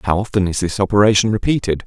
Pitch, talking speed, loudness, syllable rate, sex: 100 Hz, 195 wpm, -16 LUFS, 7.0 syllables/s, male